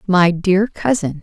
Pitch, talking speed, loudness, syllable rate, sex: 190 Hz, 145 wpm, -16 LUFS, 3.7 syllables/s, female